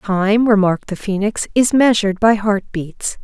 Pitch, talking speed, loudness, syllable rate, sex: 205 Hz, 150 wpm, -16 LUFS, 4.5 syllables/s, female